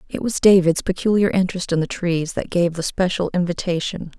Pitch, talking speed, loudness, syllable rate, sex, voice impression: 180 Hz, 185 wpm, -20 LUFS, 5.6 syllables/s, female, feminine, adult-like, slightly dark, slightly cool, calm, slightly reassuring